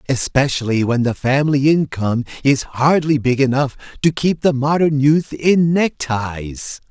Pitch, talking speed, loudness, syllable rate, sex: 135 Hz, 140 wpm, -17 LUFS, 4.4 syllables/s, male